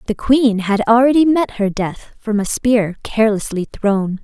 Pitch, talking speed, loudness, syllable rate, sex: 220 Hz, 170 wpm, -16 LUFS, 4.4 syllables/s, female